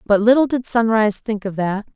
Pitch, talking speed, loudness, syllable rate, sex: 220 Hz, 215 wpm, -18 LUFS, 5.8 syllables/s, female